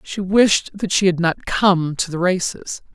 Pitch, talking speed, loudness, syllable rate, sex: 180 Hz, 205 wpm, -18 LUFS, 4.0 syllables/s, female